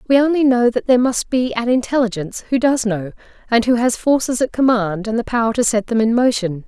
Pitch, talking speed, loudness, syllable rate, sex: 235 Hz, 235 wpm, -17 LUFS, 6.0 syllables/s, female